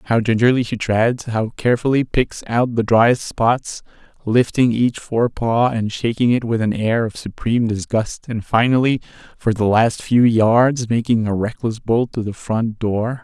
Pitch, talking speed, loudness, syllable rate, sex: 115 Hz, 175 wpm, -18 LUFS, 4.3 syllables/s, male